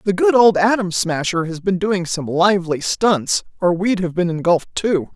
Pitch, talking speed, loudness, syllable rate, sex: 185 Hz, 200 wpm, -17 LUFS, 4.8 syllables/s, female